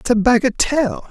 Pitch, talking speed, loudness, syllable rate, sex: 240 Hz, 165 wpm, -16 LUFS, 5.6 syllables/s, male